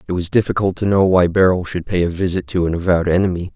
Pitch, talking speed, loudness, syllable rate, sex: 90 Hz, 255 wpm, -17 LUFS, 6.8 syllables/s, male